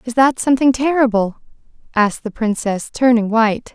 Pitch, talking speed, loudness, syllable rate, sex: 235 Hz, 145 wpm, -16 LUFS, 5.4 syllables/s, female